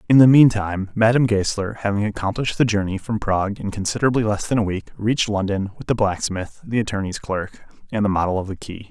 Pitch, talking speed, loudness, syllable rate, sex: 105 Hz, 210 wpm, -20 LUFS, 6.2 syllables/s, male